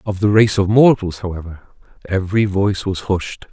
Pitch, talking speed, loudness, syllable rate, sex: 100 Hz, 170 wpm, -16 LUFS, 5.3 syllables/s, male